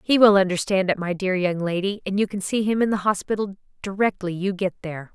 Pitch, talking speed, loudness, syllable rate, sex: 195 Hz, 235 wpm, -22 LUFS, 5.9 syllables/s, female